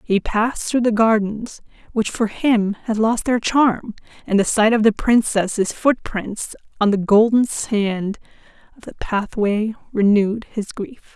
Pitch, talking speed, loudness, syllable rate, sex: 215 Hz, 155 wpm, -19 LUFS, 4.0 syllables/s, female